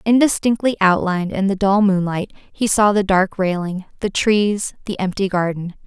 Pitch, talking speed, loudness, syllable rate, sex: 195 Hz, 165 wpm, -18 LUFS, 4.7 syllables/s, female